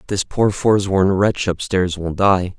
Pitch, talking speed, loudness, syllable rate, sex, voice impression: 95 Hz, 160 wpm, -18 LUFS, 4.2 syllables/s, male, masculine, adult-like, slightly tensed, slightly dark, slightly hard, fluent, cool, sincere, calm, slightly reassuring, wild, modest